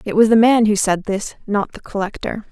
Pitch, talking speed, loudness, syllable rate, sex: 210 Hz, 240 wpm, -17 LUFS, 5.2 syllables/s, female